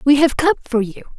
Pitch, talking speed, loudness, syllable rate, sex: 275 Hz, 255 wpm, -17 LUFS, 5.2 syllables/s, female